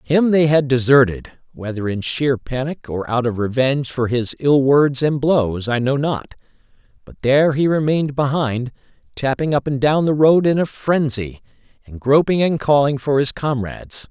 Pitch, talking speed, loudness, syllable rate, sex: 135 Hz, 180 wpm, -18 LUFS, 4.8 syllables/s, male